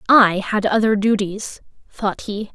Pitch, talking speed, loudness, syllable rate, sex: 205 Hz, 140 wpm, -18 LUFS, 3.8 syllables/s, female